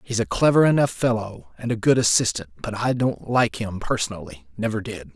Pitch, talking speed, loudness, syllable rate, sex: 110 Hz, 185 wpm, -22 LUFS, 5.4 syllables/s, male